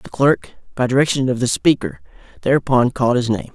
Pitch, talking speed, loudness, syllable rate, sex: 125 Hz, 185 wpm, -18 LUFS, 5.8 syllables/s, male